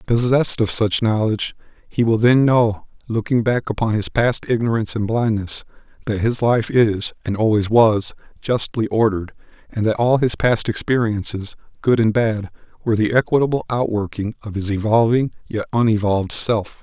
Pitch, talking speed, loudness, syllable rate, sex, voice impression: 110 Hz, 155 wpm, -19 LUFS, 5.1 syllables/s, male, masculine, adult-like, slightly thick, cool, sincere, slightly calm, slightly kind